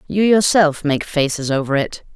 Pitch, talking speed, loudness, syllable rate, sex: 160 Hz, 165 wpm, -17 LUFS, 4.7 syllables/s, female